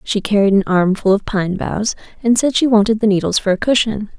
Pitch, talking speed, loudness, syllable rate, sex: 210 Hz, 230 wpm, -16 LUFS, 5.6 syllables/s, female